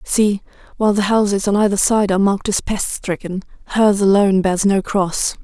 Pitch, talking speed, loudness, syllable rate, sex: 200 Hz, 190 wpm, -17 LUFS, 5.5 syllables/s, female